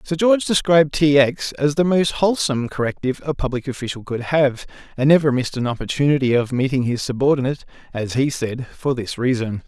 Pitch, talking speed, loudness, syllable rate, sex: 135 Hz, 185 wpm, -19 LUFS, 6.1 syllables/s, male